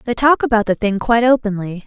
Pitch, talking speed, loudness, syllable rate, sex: 220 Hz, 225 wpm, -16 LUFS, 6.4 syllables/s, female